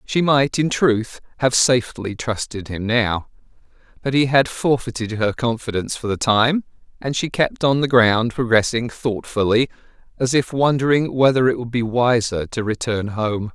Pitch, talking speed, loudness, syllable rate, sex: 120 Hz, 165 wpm, -19 LUFS, 4.6 syllables/s, male